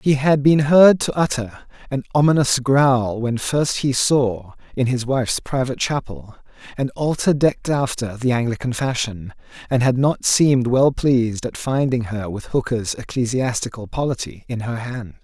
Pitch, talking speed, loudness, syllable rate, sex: 130 Hz, 160 wpm, -19 LUFS, 4.7 syllables/s, male